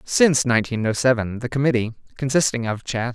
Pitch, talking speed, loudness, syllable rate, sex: 125 Hz, 170 wpm, -21 LUFS, 6.1 syllables/s, male